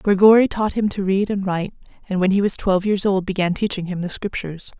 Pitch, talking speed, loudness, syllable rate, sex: 195 Hz, 240 wpm, -19 LUFS, 6.2 syllables/s, female